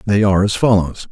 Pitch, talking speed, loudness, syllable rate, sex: 100 Hz, 215 wpm, -15 LUFS, 6.2 syllables/s, male